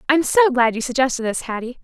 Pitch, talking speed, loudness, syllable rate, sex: 260 Hz, 230 wpm, -18 LUFS, 6.6 syllables/s, female